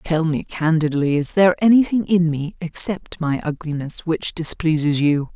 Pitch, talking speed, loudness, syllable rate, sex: 160 Hz, 155 wpm, -19 LUFS, 4.6 syllables/s, female